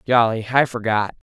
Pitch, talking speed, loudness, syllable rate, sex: 115 Hz, 135 wpm, -20 LUFS, 5.6 syllables/s, male